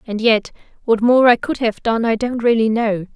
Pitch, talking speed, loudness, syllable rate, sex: 230 Hz, 230 wpm, -16 LUFS, 4.9 syllables/s, female